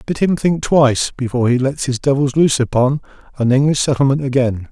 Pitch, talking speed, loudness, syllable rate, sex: 135 Hz, 190 wpm, -16 LUFS, 6.0 syllables/s, male